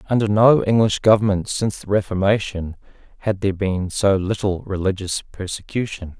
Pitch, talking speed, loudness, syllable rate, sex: 100 Hz, 135 wpm, -20 LUFS, 5.3 syllables/s, male